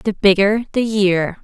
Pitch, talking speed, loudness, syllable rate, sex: 200 Hz, 165 wpm, -16 LUFS, 4.0 syllables/s, female